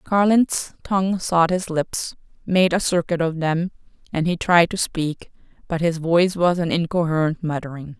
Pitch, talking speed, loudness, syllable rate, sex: 170 Hz, 160 wpm, -21 LUFS, 4.6 syllables/s, female